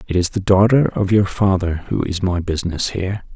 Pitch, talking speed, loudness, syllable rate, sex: 95 Hz, 215 wpm, -18 LUFS, 5.4 syllables/s, male